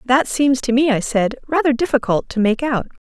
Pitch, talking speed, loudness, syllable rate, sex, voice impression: 255 Hz, 215 wpm, -18 LUFS, 5.2 syllables/s, female, feminine, adult-like, slightly relaxed, soft, slightly muffled, intellectual, calm, friendly, reassuring, elegant, slightly lively, modest